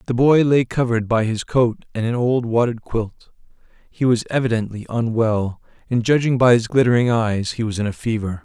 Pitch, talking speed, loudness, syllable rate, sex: 115 Hz, 190 wpm, -19 LUFS, 5.2 syllables/s, male